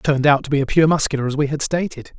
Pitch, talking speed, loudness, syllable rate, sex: 145 Hz, 330 wpm, -18 LUFS, 7.7 syllables/s, male